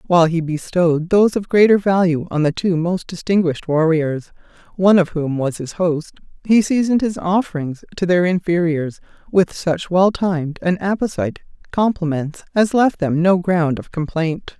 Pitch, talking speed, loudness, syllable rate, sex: 175 Hz, 165 wpm, -18 LUFS, 5.0 syllables/s, female